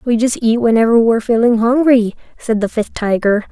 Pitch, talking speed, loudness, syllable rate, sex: 230 Hz, 190 wpm, -14 LUFS, 5.4 syllables/s, female